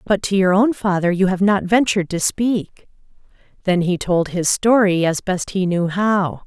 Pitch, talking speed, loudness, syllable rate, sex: 190 Hz, 195 wpm, -18 LUFS, 4.5 syllables/s, female